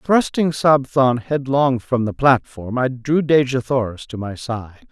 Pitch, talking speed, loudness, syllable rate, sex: 130 Hz, 170 wpm, -19 LUFS, 4.0 syllables/s, male